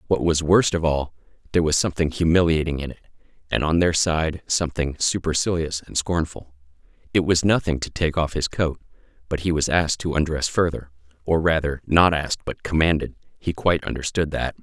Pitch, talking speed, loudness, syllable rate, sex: 80 Hz, 180 wpm, -22 LUFS, 5.7 syllables/s, male